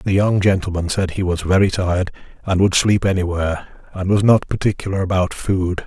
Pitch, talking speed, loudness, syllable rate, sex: 95 Hz, 185 wpm, -18 LUFS, 5.4 syllables/s, male